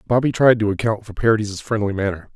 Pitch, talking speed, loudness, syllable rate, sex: 105 Hz, 205 wpm, -19 LUFS, 6.4 syllables/s, male